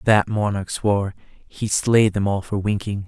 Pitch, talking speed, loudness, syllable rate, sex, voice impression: 100 Hz, 175 wpm, -21 LUFS, 4.3 syllables/s, male, masculine, middle-aged, tensed, powerful, bright, clear, raspy, cool, intellectual, slightly mature, friendly, reassuring, wild, lively, kind